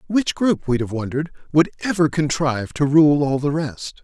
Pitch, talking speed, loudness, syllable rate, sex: 150 Hz, 195 wpm, -20 LUFS, 5.2 syllables/s, male